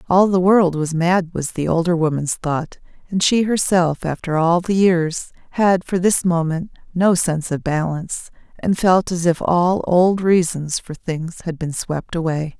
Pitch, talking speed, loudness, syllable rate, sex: 175 Hz, 180 wpm, -18 LUFS, 4.3 syllables/s, female